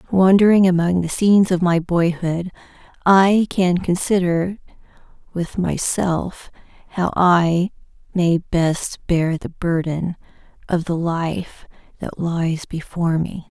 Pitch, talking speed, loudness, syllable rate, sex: 175 Hz, 115 wpm, -19 LUFS, 3.7 syllables/s, female